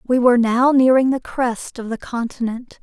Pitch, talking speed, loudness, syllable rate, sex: 245 Hz, 190 wpm, -18 LUFS, 4.8 syllables/s, female